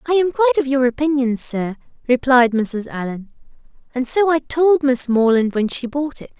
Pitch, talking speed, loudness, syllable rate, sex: 265 Hz, 190 wpm, -18 LUFS, 5.0 syllables/s, female